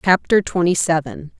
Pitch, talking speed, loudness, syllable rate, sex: 175 Hz, 130 wpm, -17 LUFS, 4.8 syllables/s, female